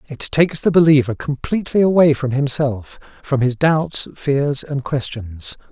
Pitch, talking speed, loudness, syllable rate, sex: 140 Hz, 145 wpm, -18 LUFS, 4.5 syllables/s, male